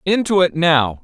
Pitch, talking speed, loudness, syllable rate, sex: 170 Hz, 175 wpm, -15 LUFS, 4.4 syllables/s, male